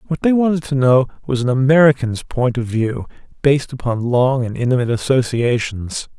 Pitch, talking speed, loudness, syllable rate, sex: 130 Hz, 165 wpm, -17 LUFS, 5.4 syllables/s, male